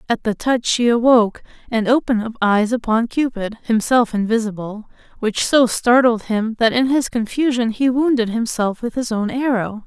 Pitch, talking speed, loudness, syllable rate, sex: 230 Hz, 165 wpm, -18 LUFS, 4.5 syllables/s, female